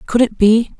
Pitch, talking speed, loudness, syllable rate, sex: 225 Hz, 225 wpm, -14 LUFS, 4.7 syllables/s, female